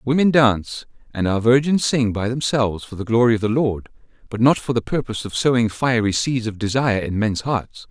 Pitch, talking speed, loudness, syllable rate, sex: 120 Hz, 220 wpm, -19 LUFS, 5.7 syllables/s, male